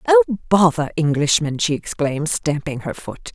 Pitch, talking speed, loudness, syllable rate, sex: 160 Hz, 145 wpm, -19 LUFS, 4.9 syllables/s, female